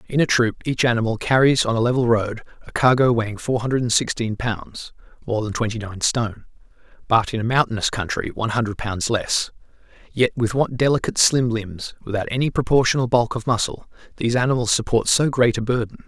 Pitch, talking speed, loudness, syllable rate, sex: 120 Hz, 185 wpm, -20 LUFS, 5.5 syllables/s, male